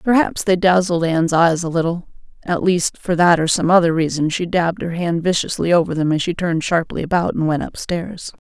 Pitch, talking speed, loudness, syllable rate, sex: 170 Hz, 215 wpm, -18 LUFS, 5.6 syllables/s, female